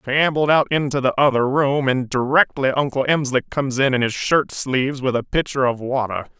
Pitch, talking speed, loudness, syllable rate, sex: 135 Hz, 205 wpm, -19 LUFS, 5.5 syllables/s, male